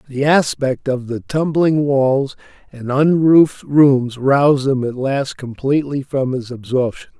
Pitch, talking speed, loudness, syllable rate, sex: 135 Hz, 140 wpm, -16 LUFS, 4.1 syllables/s, male